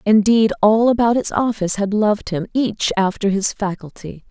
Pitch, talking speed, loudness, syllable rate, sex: 210 Hz, 165 wpm, -17 LUFS, 5.0 syllables/s, female